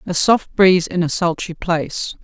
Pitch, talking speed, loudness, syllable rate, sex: 175 Hz, 190 wpm, -17 LUFS, 4.8 syllables/s, female